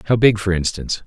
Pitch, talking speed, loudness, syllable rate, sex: 100 Hz, 225 wpm, -18 LUFS, 6.8 syllables/s, male